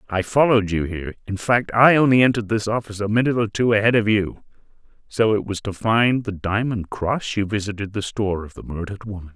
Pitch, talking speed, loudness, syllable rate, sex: 105 Hz, 210 wpm, -20 LUFS, 6.2 syllables/s, male